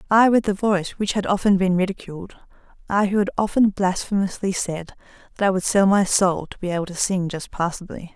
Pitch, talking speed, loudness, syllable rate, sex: 190 Hz, 205 wpm, -21 LUFS, 5.8 syllables/s, female